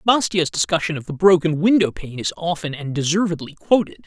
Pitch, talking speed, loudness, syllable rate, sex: 170 Hz, 175 wpm, -20 LUFS, 5.6 syllables/s, male